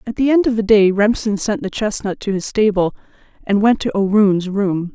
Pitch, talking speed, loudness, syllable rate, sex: 205 Hz, 220 wpm, -16 LUFS, 5.1 syllables/s, female